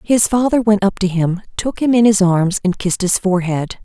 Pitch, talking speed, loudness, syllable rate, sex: 200 Hz, 235 wpm, -15 LUFS, 5.4 syllables/s, female